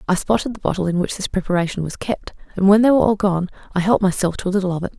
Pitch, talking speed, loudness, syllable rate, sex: 190 Hz, 290 wpm, -19 LUFS, 7.6 syllables/s, female